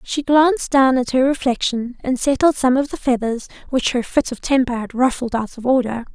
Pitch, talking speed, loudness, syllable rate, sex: 255 Hz, 215 wpm, -18 LUFS, 5.3 syllables/s, female